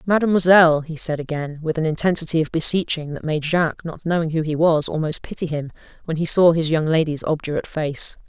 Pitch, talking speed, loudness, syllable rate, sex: 160 Hz, 190 wpm, -20 LUFS, 6.0 syllables/s, female